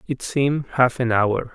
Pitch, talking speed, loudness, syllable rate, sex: 125 Hz, 195 wpm, -20 LUFS, 4.4 syllables/s, male